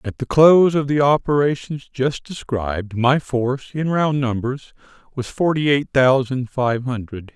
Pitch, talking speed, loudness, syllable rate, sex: 135 Hz, 155 wpm, -19 LUFS, 4.5 syllables/s, male